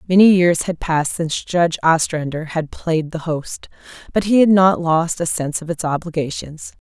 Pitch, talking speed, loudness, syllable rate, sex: 165 Hz, 185 wpm, -18 LUFS, 5.1 syllables/s, female